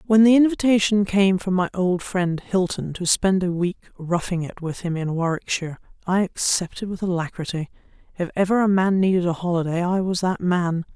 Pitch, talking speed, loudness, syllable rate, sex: 185 Hz, 185 wpm, -22 LUFS, 5.2 syllables/s, female